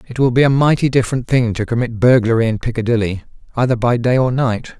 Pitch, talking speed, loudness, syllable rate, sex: 120 Hz, 215 wpm, -16 LUFS, 6.2 syllables/s, male